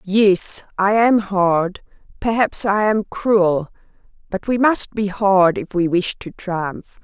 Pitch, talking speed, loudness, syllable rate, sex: 195 Hz, 155 wpm, -18 LUFS, 3.3 syllables/s, female